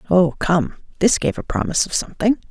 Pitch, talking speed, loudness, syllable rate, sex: 195 Hz, 190 wpm, -19 LUFS, 6.0 syllables/s, female